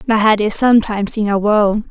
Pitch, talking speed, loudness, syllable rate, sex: 210 Hz, 220 wpm, -14 LUFS, 5.8 syllables/s, female